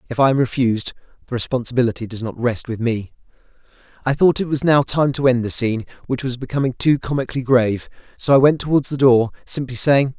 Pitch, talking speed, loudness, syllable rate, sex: 125 Hz, 205 wpm, -18 LUFS, 6.3 syllables/s, male